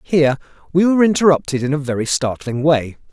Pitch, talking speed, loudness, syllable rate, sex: 150 Hz, 175 wpm, -17 LUFS, 6.3 syllables/s, male